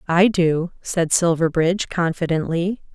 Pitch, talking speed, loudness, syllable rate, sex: 170 Hz, 100 wpm, -20 LUFS, 4.2 syllables/s, female